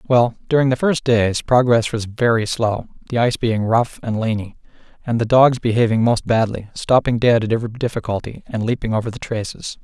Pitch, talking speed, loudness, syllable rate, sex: 115 Hz, 190 wpm, -18 LUFS, 5.6 syllables/s, male